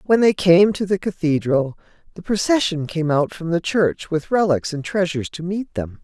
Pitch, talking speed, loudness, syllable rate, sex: 180 Hz, 200 wpm, -20 LUFS, 4.9 syllables/s, female